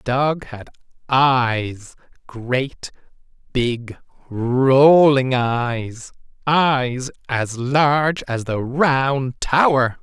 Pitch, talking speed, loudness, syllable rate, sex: 130 Hz, 90 wpm, -18 LUFS, 2.3 syllables/s, male